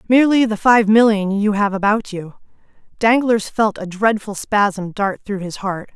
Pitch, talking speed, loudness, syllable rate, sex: 210 Hz, 170 wpm, -17 LUFS, 4.5 syllables/s, female